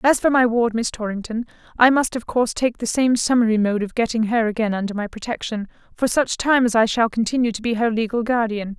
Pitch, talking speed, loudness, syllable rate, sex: 230 Hz, 230 wpm, -20 LUFS, 5.9 syllables/s, female